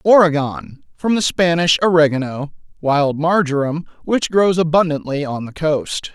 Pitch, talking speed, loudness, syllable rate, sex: 160 Hz, 115 wpm, -17 LUFS, 4.4 syllables/s, male